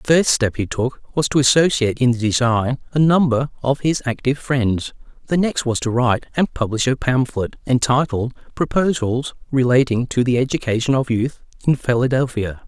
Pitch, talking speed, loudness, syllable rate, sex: 130 Hz, 170 wpm, -19 LUFS, 5.2 syllables/s, male